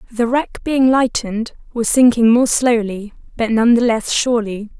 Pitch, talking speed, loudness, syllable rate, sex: 235 Hz, 165 wpm, -16 LUFS, 4.7 syllables/s, female